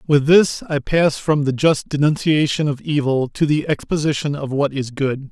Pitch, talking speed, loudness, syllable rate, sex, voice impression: 145 Hz, 190 wpm, -18 LUFS, 4.7 syllables/s, male, masculine, adult-like, slightly fluent, slightly refreshing, friendly, slightly unique